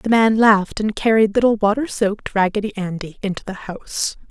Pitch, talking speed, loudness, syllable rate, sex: 210 Hz, 180 wpm, -18 LUFS, 5.6 syllables/s, female